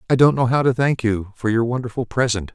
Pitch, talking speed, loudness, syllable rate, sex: 120 Hz, 260 wpm, -19 LUFS, 6.0 syllables/s, male